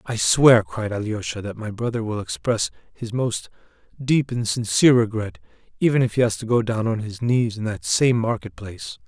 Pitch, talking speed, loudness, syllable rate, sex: 110 Hz, 200 wpm, -21 LUFS, 5.1 syllables/s, male